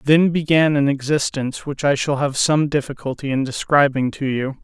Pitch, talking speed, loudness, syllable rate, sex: 140 Hz, 180 wpm, -19 LUFS, 5.1 syllables/s, male